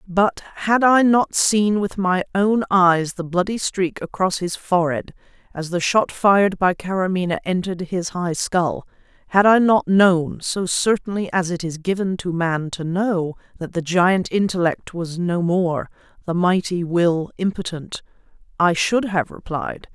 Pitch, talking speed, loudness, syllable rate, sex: 185 Hz, 160 wpm, -20 LUFS, 4.2 syllables/s, female